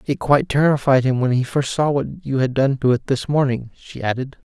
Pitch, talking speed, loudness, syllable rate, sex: 135 Hz, 240 wpm, -19 LUFS, 5.7 syllables/s, male